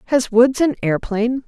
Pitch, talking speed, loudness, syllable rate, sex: 240 Hz, 165 wpm, -17 LUFS, 6.0 syllables/s, female